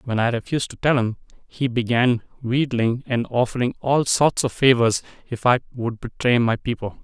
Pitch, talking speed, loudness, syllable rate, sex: 120 Hz, 180 wpm, -21 LUFS, 5.1 syllables/s, male